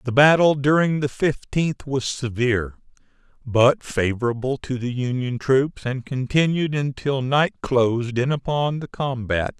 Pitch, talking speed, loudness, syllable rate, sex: 135 Hz, 140 wpm, -21 LUFS, 4.2 syllables/s, male